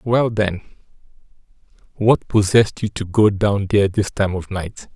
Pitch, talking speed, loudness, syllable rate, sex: 100 Hz, 155 wpm, -18 LUFS, 4.6 syllables/s, male